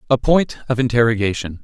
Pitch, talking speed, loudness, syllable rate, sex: 120 Hz, 145 wpm, -18 LUFS, 6.0 syllables/s, male